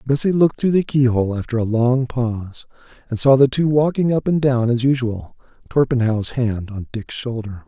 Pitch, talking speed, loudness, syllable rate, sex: 125 Hz, 190 wpm, -18 LUFS, 5.2 syllables/s, male